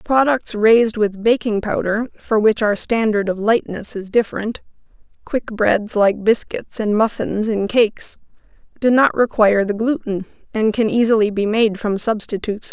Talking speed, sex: 150 wpm, female